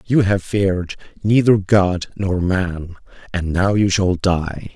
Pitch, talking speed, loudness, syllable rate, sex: 95 Hz, 150 wpm, -18 LUFS, 3.6 syllables/s, male